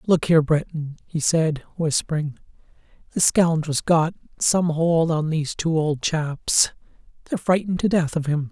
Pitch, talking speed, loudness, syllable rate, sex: 160 Hz, 150 wpm, -21 LUFS, 4.7 syllables/s, male